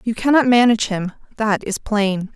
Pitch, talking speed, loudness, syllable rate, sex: 220 Hz, 180 wpm, -17 LUFS, 5.0 syllables/s, female